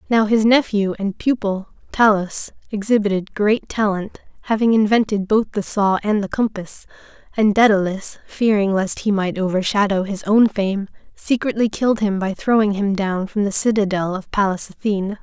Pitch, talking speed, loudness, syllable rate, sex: 205 Hz, 160 wpm, -19 LUFS, 4.9 syllables/s, female